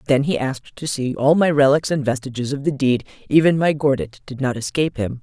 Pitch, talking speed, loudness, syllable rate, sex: 140 Hz, 230 wpm, -19 LUFS, 5.9 syllables/s, female